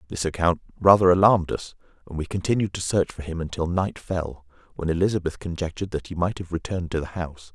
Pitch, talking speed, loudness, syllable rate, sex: 85 Hz, 205 wpm, -24 LUFS, 6.4 syllables/s, male